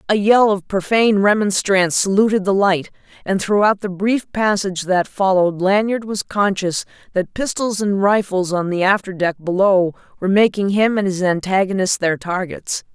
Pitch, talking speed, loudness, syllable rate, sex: 195 Hz, 160 wpm, -17 LUFS, 5.0 syllables/s, female